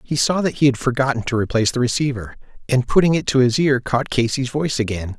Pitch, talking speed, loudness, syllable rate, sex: 130 Hz, 230 wpm, -19 LUFS, 6.3 syllables/s, male